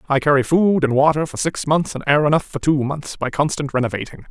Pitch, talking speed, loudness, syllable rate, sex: 145 Hz, 235 wpm, -18 LUFS, 5.9 syllables/s, male